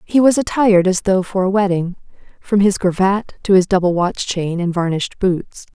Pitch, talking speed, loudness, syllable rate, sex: 190 Hz, 195 wpm, -16 LUFS, 5.1 syllables/s, female